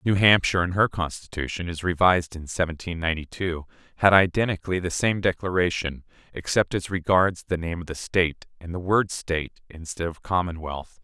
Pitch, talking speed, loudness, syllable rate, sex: 90 Hz, 170 wpm, -24 LUFS, 5.5 syllables/s, male